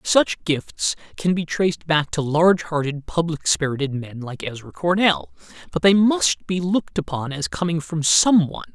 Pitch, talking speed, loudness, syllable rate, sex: 160 Hz, 180 wpm, -21 LUFS, 4.8 syllables/s, male